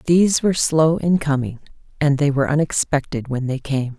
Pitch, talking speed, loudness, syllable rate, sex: 145 Hz, 180 wpm, -19 LUFS, 5.5 syllables/s, female